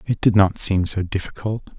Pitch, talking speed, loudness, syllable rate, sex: 100 Hz, 200 wpm, -20 LUFS, 4.9 syllables/s, male